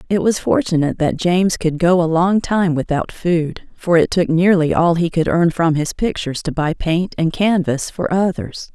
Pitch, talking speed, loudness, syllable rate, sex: 170 Hz, 205 wpm, -17 LUFS, 4.8 syllables/s, female